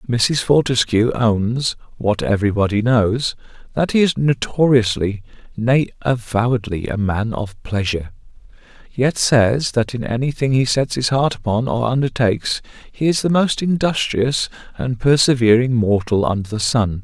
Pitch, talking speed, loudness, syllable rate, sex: 120 Hz, 145 wpm, -18 LUFS, 4.5 syllables/s, male